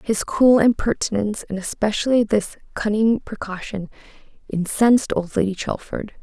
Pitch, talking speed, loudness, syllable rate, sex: 210 Hz, 115 wpm, -20 LUFS, 5.0 syllables/s, female